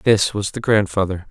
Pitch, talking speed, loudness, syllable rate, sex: 100 Hz, 185 wpm, -19 LUFS, 4.8 syllables/s, male